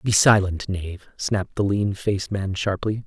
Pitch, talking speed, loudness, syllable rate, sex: 100 Hz, 175 wpm, -22 LUFS, 4.9 syllables/s, male